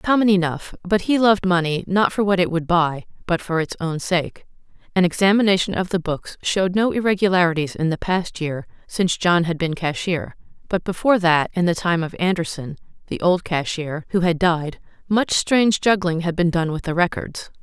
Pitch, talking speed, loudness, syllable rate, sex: 175 Hz, 195 wpm, -20 LUFS, 5.3 syllables/s, female